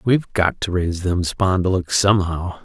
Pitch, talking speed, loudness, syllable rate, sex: 95 Hz, 160 wpm, -19 LUFS, 5.2 syllables/s, male